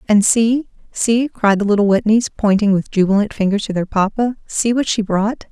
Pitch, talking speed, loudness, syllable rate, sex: 215 Hz, 185 wpm, -16 LUFS, 5.0 syllables/s, female